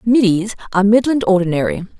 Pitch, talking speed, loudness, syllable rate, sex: 205 Hz, 120 wpm, -15 LUFS, 6.1 syllables/s, female